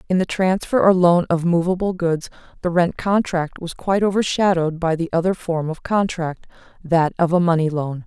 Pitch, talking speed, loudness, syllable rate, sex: 175 Hz, 185 wpm, -19 LUFS, 5.3 syllables/s, female